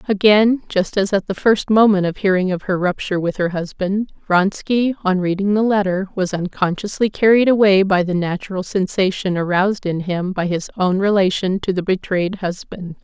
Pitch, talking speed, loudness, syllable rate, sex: 190 Hz, 180 wpm, -18 LUFS, 5.1 syllables/s, female